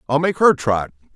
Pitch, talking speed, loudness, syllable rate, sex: 130 Hz, 205 wpm, -17 LUFS, 5.1 syllables/s, male